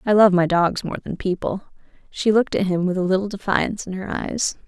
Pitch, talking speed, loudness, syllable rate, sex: 190 Hz, 230 wpm, -21 LUFS, 5.8 syllables/s, female